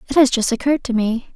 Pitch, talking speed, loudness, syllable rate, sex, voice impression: 245 Hz, 265 wpm, -18 LUFS, 7.0 syllables/s, female, feminine, slightly young, slightly relaxed, slightly weak, slightly bright, soft, slightly raspy, cute, calm, friendly, reassuring, kind, modest